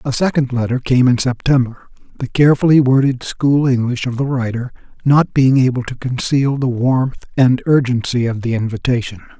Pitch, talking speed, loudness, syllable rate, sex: 125 Hz, 165 wpm, -16 LUFS, 5.1 syllables/s, male